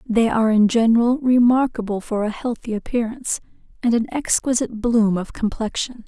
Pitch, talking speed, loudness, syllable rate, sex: 230 Hz, 150 wpm, -20 LUFS, 5.4 syllables/s, female